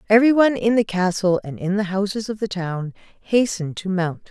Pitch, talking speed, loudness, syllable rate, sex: 200 Hz, 210 wpm, -20 LUFS, 5.6 syllables/s, female